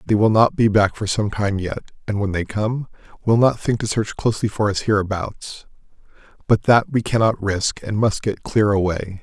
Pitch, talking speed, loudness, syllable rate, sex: 105 Hz, 210 wpm, -20 LUFS, 5.0 syllables/s, male